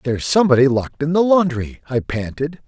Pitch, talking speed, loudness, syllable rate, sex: 145 Hz, 180 wpm, -18 LUFS, 6.1 syllables/s, male